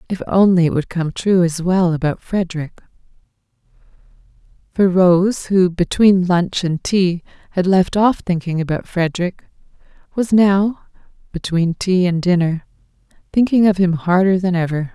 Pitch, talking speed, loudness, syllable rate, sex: 180 Hz, 140 wpm, -17 LUFS, 4.6 syllables/s, female